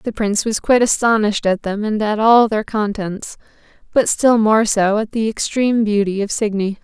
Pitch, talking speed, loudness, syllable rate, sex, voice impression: 215 Hz, 195 wpm, -16 LUFS, 5.1 syllables/s, female, very feminine, slightly young, slightly adult-like, thin, slightly relaxed, slightly weak, slightly bright, slightly soft, clear, fluent, cute, very intellectual, very refreshing, slightly sincere, calm, friendly, reassuring, slightly unique, slightly elegant, sweet, slightly lively, kind, slightly modest